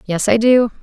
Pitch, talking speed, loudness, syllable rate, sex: 220 Hz, 215 wpm, -14 LUFS, 4.6 syllables/s, female